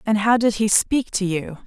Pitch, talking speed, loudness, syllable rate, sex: 210 Hz, 250 wpm, -19 LUFS, 4.6 syllables/s, female